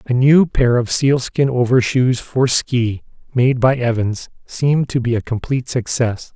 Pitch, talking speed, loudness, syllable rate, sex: 125 Hz, 160 wpm, -17 LUFS, 4.2 syllables/s, male